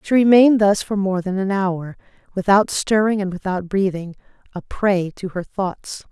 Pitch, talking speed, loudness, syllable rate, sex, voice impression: 195 Hz, 175 wpm, -19 LUFS, 4.6 syllables/s, female, feminine, adult-like, tensed, powerful, soft, slightly raspy, intellectual, calm, reassuring, elegant, slightly lively, slightly sharp, slightly modest